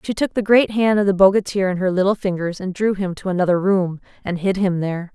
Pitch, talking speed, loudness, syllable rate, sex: 190 Hz, 255 wpm, -19 LUFS, 6.0 syllables/s, female